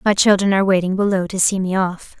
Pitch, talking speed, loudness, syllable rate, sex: 190 Hz, 245 wpm, -17 LUFS, 6.2 syllables/s, female